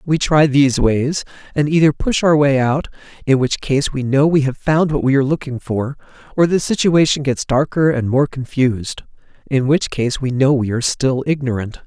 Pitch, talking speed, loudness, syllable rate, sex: 140 Hz, 195 wpm, -16 LUFS, 5.1 syllables/s, male